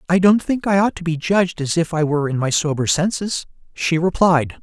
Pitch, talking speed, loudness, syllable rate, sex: 170 Hz, 235 wpm, -18 LUFS, 5.5 syllables/s, male